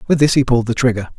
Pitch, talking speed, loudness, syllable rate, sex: 125 Hz, 305 wpm, -15 LUFS, 8.4 syllables/s, male